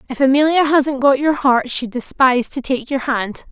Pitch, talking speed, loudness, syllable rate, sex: 265 Hz, 205 wpm, -16 LUFS, 4.9 syllables/s, female